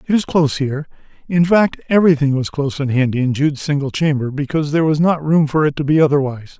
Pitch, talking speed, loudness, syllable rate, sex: 150 Hz, 225 wpm, -16 LUFS, 7.0 syllables/s, male